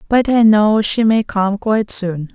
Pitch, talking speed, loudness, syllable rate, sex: 210 Hz, 205 wpm, -15 LUFS, 4.2 syllables/s, female